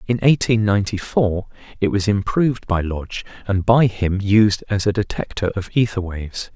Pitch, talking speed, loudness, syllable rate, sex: 105 Hz, 175 wpm, -19 LUFS, 5.0 syllables/s, male